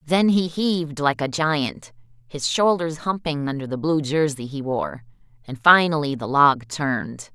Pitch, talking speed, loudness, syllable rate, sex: 145 Hz, 165 wpm, -21 LUFS, 4.3 syllables/s, female